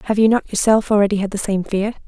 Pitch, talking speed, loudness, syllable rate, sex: 205 Hz, 260 wpm, -17 LUFS, 6.7 syllables/s, female